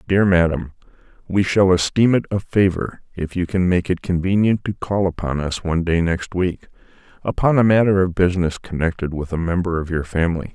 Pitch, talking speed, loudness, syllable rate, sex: 90 Hz, 190 wpm, -19 LUFS, 5.5 syllables/s, male